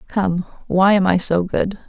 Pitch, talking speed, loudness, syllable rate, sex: 185 Hz, 190 wpm, -18 LUFS, 4.1 syllables/s, female